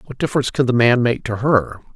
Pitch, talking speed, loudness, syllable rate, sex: 125 Hz, 245 wpm, -17 LUFS, 6.4 syllables/s, male